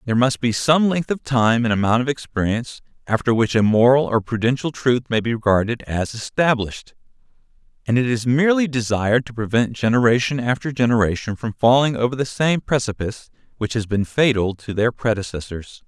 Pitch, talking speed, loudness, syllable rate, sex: 120 Hz, 175 wpm, -19 LUFS, 5.7 syllables/s, male